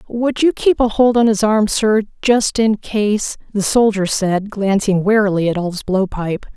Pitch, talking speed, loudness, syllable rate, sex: 210 Hz, 185 wpm, -16 LUFS, 4.2 syllables/s, female